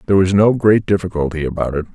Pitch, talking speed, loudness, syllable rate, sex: 90 Hz, 215 wpm, -16 LUFS, 7.0 syllables/s, male